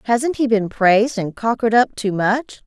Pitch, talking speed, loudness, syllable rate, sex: 225 Hz, 205 wpm, -18 LUFS, 4.9 syllables/s, female